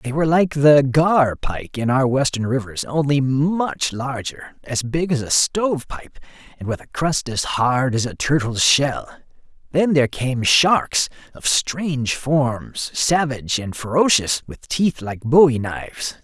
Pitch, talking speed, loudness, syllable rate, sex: 135 Hz, 155 wpm, -19 LUFS, 4.0 syllables/s, male